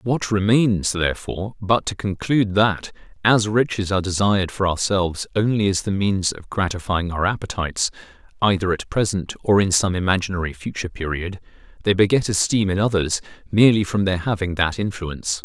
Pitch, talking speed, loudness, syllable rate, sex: 100 Hz, 160 wpm, -21 LUFS, 5.6 syllables/s, male